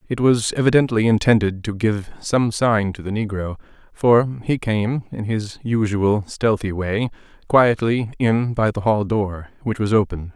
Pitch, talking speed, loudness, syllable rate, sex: 110 Hz, 160 wpm, -20 LUFS, 4.3 syllables/s, male